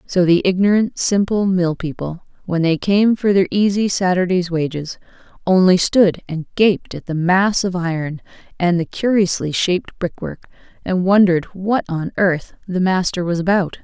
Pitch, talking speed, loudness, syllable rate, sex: 185 Hz, 160 wpm, -17 LUFS, 4.6 syllables/s, female